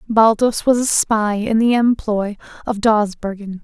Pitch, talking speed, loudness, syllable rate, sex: 215 Hz, 150 wpm, -17 LUFS, 4.1 syllables/s, female